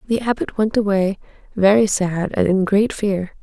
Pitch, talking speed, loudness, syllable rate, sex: 200 Hz, 175 wpm, -18 LUFS, 4.5 syllables/s, female